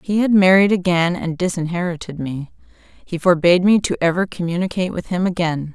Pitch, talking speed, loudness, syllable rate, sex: 175 Hz, 165 wpm, -18 LUFS, 5.8 syllables/s, female